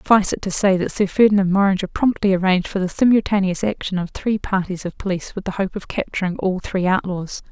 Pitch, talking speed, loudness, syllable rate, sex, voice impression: 190 Hz, 215 wpm, -20 LUFS, 6.4 syllables/s, female, feminine, adult-like, relaxed, slightly weak, soft, slightly muffled, slightly raspy, slightly intellectual, calm, friendly, reassuring, elegant, kind, modest